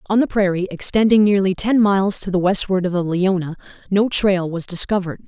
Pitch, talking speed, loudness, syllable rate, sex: 190 Hz, 195 wpm, -18 LUFS, 5.7 syllables/s, female